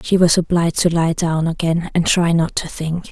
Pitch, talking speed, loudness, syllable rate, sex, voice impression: 170 Hz, 230 wpm, -17 LUFS, 5.0 syllables/s, female, very feminine, very adult-like, thin, slightly tensed, relaxed, very weak, dark, soft, slightly clear, fluent, very cute, intellectual, slightly refreshing, sincere, very calm, very friendly, very reassuring, very unique, elegant, slightly wild, very sweet, slightly lively, kind, very modest, light